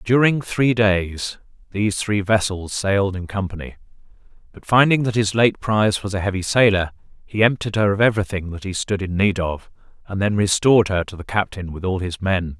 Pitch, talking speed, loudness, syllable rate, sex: 100 Hz, 195 wpm, -20 LUFS, 5.4 syllables/s, male